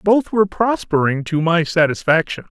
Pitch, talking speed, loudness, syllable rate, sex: 175 Hz, 140 wpm, -17 LUFS, 5.0 syllables/s, male